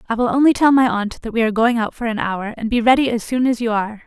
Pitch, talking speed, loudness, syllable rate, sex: 230 Hz, 325 wpm, -17 LUFS, 6.7 syllables/s, female